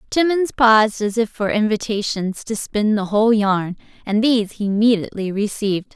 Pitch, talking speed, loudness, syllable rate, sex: 215 Hz, 160 wpm, -18 LUFS, 5.4 syllables/s, female